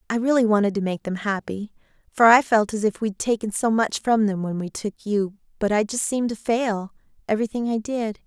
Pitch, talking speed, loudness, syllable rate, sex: 215 Hz, 225 wpm, -22 LUFS, 5.6 syllables/s, female